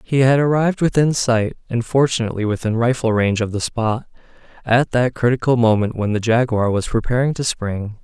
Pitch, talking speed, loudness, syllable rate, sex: 120 Hz, 180 wpm, -18 LUFS, 5.5 syllables/s, male